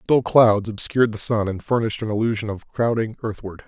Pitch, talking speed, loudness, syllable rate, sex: 110 Hz, 195 wpm, -21 LUFS, 5.8 syllables/s, male